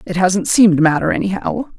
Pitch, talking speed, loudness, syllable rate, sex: 190 Hz, 200 wpm, -15 LUFS, 6.2 syllables/s, female